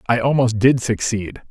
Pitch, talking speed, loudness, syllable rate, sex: 115 Hz, 160 wpm, -18 LUFS, 4.8 syllables/s, male